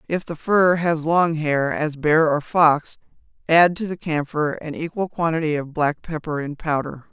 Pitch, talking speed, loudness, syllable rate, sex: 160 Hz, 185 wpm, -20 LUFS, 4.4 syllables/s, female